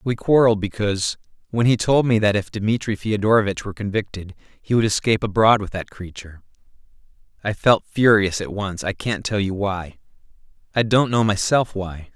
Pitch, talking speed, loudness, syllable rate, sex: 105 Hz, 170 wpm, -20 LUFS, 5.5 syllables/s, male